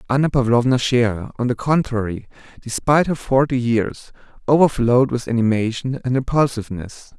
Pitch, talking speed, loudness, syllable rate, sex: 125 Hz, 125 wpm, -19 LUFS, 5.5 syllables/s, male